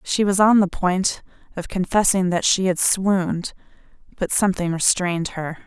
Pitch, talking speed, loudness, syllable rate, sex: 185 Hz, 160 wpm, -20 LUFS, 4.8 syllables/s, female